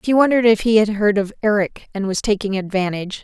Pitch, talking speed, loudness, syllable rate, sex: 205 Hz, 225 wpm, -18 LUFS, 6.3 syllables/s, female